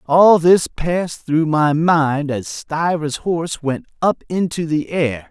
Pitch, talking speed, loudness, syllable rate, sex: 160 Hz, 160 wpm, -17 LUFS, 3.6 syllables/s, male